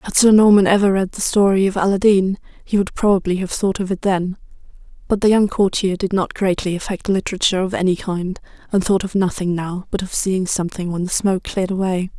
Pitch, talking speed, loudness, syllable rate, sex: 190 Hz, 210 wpm, -18 LUFS, 6.0 syllables/s, female